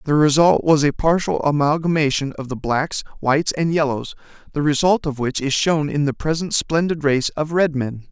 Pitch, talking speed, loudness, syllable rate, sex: 150 Hz, 190 wpm, -19 LUFS, 5.0 syllables/s, male